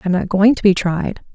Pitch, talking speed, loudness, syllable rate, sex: 195 Hz, 270 wpm, -16 LUFS, 5.2 syllables/s, female